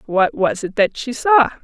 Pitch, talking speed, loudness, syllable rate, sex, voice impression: 235 Hz, 220 wpm, -17 LUFS, 4.3 syllables/s, female, feminine, adult-like, slightly muffled, slightly intellectual, slightly calm, unique